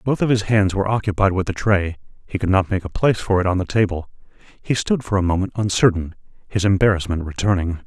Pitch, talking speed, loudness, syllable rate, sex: 95 Hz, 220 wpm, -20 LUFS, 6.5 syllables/s, male